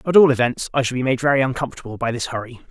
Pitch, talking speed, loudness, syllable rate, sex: 130 Hz, 265 wpm, -20 LUFS, 7.8 syllables/s, male